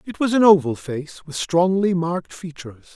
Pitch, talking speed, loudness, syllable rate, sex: 170 Hz, 185 wpm, -19 LUFS, 5.3 syllables/s, male